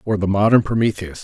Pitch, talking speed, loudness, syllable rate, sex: 100 Hz, 195 wpm, -17 LUFS, 6.2 syllables/s, male